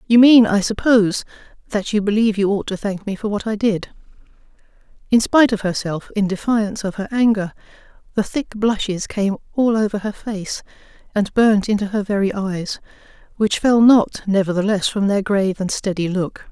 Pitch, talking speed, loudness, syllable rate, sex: 205 Hz, 170 wpm, -18 LUFS, 5.4 syllables/s, female